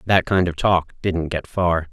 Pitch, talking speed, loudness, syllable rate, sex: 90 Hz, 220 wpm, -20 LUFS, 4.1 syllables/s, male